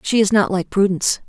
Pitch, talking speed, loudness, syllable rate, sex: 200 Hz, 235 wpm, -17 LUFS, 6.1 syllables/s, female